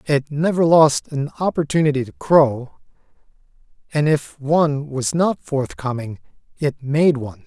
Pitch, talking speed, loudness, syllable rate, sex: 145 Hz, 130 wpm, -19 LUFS, 4.4 syllables/s, male